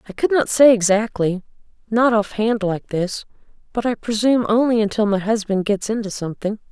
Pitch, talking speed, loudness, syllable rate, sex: 215 Hz, 160 wpm, -19 LUFS, 5.5 syllables/s, female